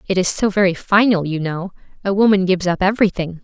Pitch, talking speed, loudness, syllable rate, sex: 190 Hz, 210 wpm, -17 LUFS, 6.5 syllables/s, female